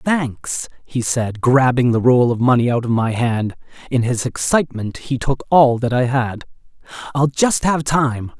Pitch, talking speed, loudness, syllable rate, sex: 125 Hz, 165 wpm, -17 LUFS, 4.3 syllables/s, male